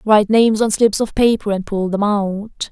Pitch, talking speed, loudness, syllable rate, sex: 210 Hz, 220 wpm, -16 LUFS, 5.0 syllables/s, female